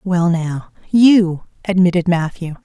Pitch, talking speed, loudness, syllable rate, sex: 180 Hz, 115 wpm, -15 LUFS, 3.6 syllables/s, female